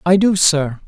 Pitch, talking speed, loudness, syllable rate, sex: 170 Hz, 205 wpm, -14 LUFS, 4.1 syllables/s, male